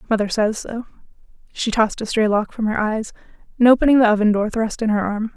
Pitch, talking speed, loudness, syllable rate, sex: 220 Hz, 225 wpm, -19 LUFS, 6.2 syllables/s, female